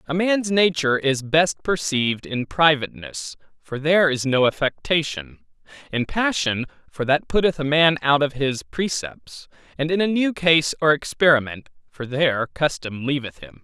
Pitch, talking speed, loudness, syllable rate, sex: 145 Hz, 160 wpm, -21 LUFS, 4.8 syllables/s, male